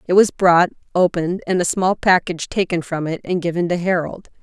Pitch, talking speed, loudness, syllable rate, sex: 175 Hz, 205 wpm, -18 LUFS, 5.6 syllables/s, female